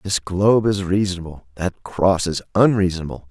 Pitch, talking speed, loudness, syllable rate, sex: 90 Hz, 145 wpm, -19 LUFS, 5.4 syllables/s, male